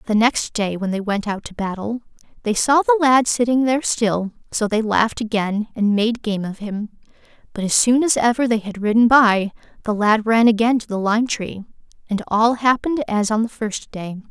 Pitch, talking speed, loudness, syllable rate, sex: 220 Hz, 210 wpm, -19 LUFS, 5.1 syllables/s, female